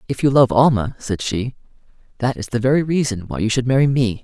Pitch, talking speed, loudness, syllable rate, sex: 120 Hz, 225 wpm, -18 LUFS, 5.9 syllables/s, male